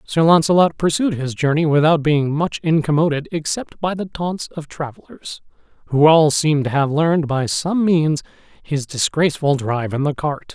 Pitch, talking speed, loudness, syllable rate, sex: 155 Hz, 170 wpm, -18 LUFS, 5.0 syllables/s, male